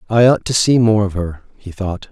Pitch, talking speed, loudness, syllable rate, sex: 100 Hz, 255 wpm, -15 LUFS, 5.1 syllables/s, male